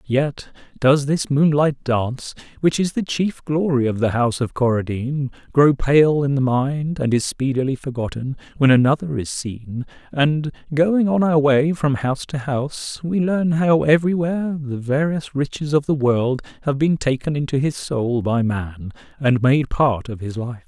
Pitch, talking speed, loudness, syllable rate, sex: 140 Hz, 175 wpm, -20 LUFS, 4.6 syllables/s, male